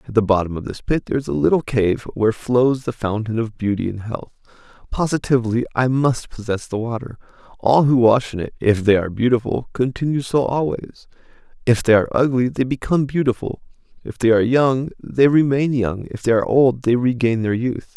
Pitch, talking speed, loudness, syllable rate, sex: 120 Hz, 195 wpm, -19 LUFS, 5.7 syllables/s, male